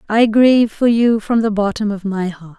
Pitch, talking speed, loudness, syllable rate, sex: 215 Hz, 230 wpm, -15 LUFS, 5.0 syllables/s, female